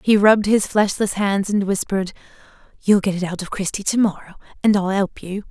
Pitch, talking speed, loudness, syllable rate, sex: 195 Hz, 205 wpm, -19 LUFS, 5.8 syllables/s, female